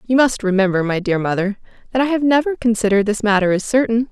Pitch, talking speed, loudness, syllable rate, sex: 220 Hz, 220 wpm, -17 LUFS, 6.5 syllables/s, female